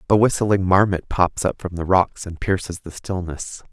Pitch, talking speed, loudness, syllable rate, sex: 90 Hz, 195 wpm, -21 LUFS, 4.6 syllables/s, male